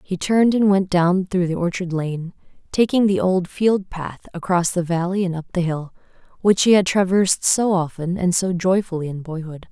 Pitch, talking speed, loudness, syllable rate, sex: 180 Hz, 200 wpm, -20 LUFS, 5.0 syllables/s, female